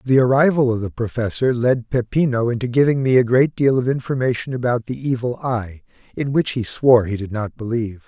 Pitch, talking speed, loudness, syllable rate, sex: 120 Hz, 200 wpm, -19 LUFS, 5.6 syllables/s, male